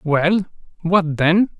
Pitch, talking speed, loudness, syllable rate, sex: 175 Hz, 115 wpm, -18 LUFS, 2.7 syllables/s, male